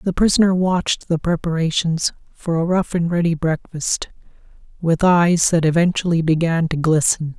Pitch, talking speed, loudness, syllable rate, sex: 170 Hz, 145 wpm, -18 LUFS, 4.9 syllables/s, male